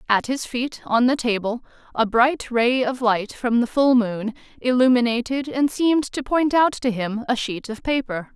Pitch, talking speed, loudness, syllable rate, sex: 245 Hz, 195 wpm, -21 LUFS, 4.5 syllables/s, female